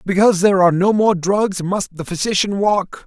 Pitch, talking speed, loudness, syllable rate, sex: 190 Hz, 195 wpm, -16 LUFS, 5.4 syllables/s, male